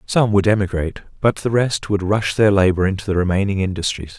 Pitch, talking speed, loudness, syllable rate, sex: 100 Hz, 200 wpm, -18 LUFS, 5.9 syllables/s, male